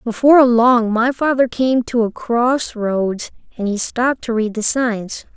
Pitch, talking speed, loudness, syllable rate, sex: 235 Hz, 170 wpm, -16 LUFS, 4.1 syllables/s, female